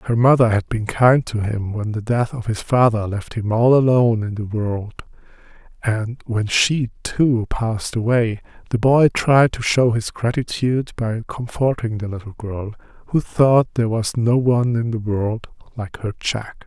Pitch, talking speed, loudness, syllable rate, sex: 115 Hz, 180 wpm, -19 LUFS, 4.4 syllables/s, male